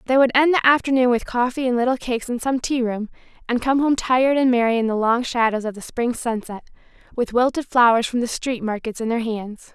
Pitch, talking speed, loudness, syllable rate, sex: 240 Hz, 235 wpm, -20 LUFS, 5.8 syllables/s, female